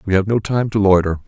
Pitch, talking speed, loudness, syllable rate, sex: 100 Hz, 280 wpm, -16 LUFS, 6.3 syllables/s, male